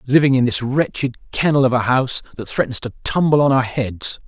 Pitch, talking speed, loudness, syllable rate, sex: 130 Hz, 210 wpm, -18 LUFS, 5.5 syllables/s, male